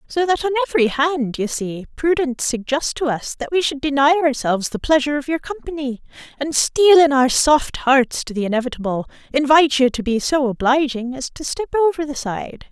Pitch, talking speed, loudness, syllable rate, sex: 280 Hz, 195 wpm, -18 LUFS, 5.6 syllables/s, female